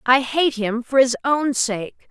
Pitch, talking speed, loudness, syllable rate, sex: 255 Hz, 200 wpm, -19 LUFS, 3.7 syllables/s, female